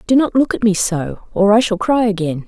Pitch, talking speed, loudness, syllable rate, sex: 210 Hz, 265 wpm, -16 LUFS, 5.5 syllables/s, female